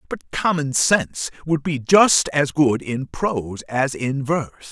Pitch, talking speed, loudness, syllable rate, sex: 140 Hz, 165 wpm, -20 LUFS, 3.9 syllables/s, male